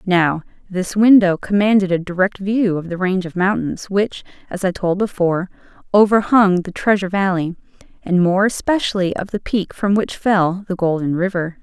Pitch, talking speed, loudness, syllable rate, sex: 190 Hz, 170 wpm, -17 LUFS, 5.0 syllables/s, female